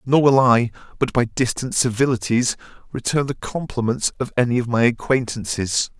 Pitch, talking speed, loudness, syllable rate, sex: 125 Hz, 150 wpm, -20 LUFS, 5.1 syllables/s, male